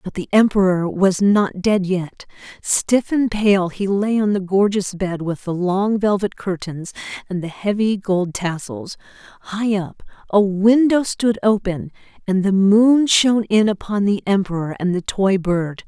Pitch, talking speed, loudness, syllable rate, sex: 195 Hz, 165 wpm, -18 LUFS, 4.2 syllables/s, female